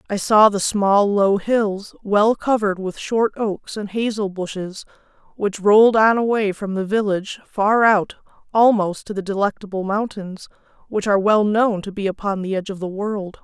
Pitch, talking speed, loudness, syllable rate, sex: 205 Hz, 180 wpm, -19 LUFS, 4.8 syllables/s, female